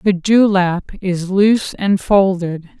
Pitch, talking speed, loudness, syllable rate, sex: 190 Hz, 130 wpm, -15 LUFS, 3.6 syllables/s, female